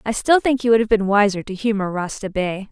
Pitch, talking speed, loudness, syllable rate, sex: 210 Hz, 265 wpm, -19 LUFS, 5.8 syllables/s, female